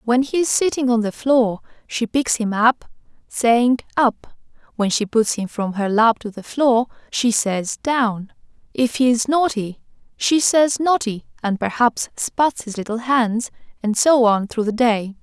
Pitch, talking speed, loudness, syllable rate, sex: 235 Hz, 175 wpm, -19 LUFS, 4.1 syllables/s, female